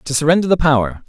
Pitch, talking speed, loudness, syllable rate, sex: 140 Hz, 220 wpm, -15 LUFS, 7.2 syllables/s, male